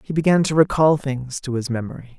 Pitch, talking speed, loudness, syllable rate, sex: 140 Hz, 220 wpm, -20 LUFS, 5.7 syllables/s, male